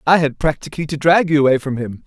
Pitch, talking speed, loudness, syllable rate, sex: 150 Hz, 260 wpm, -17 LUFS, 6.7 syllables/s, male